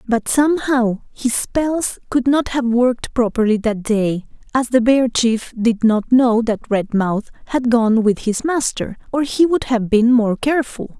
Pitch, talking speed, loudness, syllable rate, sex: 240 Hz, 175 wpm, -17 LUFS, 4.1 syllables/s, female